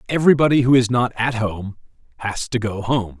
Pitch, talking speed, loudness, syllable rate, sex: 115 Hz, 190 wpm, -19 LUFS, 5.5 syllables/s, male